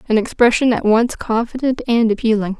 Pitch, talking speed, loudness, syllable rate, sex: 230 Hz, 160 wpm, -16 LUFS, 5.5 syllables/s, female